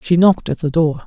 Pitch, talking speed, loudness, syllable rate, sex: 165 Hz, 280 wpm, -16 LUFS, 6.4 syllables/s, male